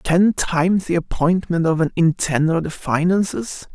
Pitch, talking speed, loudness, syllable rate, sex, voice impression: 170 Hz, 160 wpm, -19 LUFS, 4.7 syllables/s, male, masculine, adult-like, powerful, slightly halting, raspy, sincere, friendly, unique, wild, lively, intense